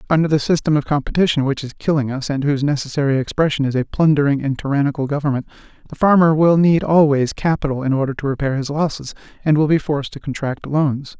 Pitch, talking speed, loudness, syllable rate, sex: 145 Hz, 205 wpm, -18 LUFS, 6.4 syllables/s, male